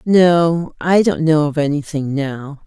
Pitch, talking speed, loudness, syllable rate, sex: 155 Hz, 160 wpm, -16 LUFS, 3.6 syllables/s, female